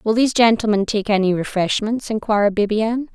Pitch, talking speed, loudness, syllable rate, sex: 215 Hz, 155 wpm, -18 LUFS, 5.9 syllables/s, female